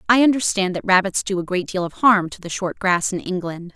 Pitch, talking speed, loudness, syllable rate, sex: 190 Hz, 255 wpm, -20 LUFS, 5.6 syllables/s, female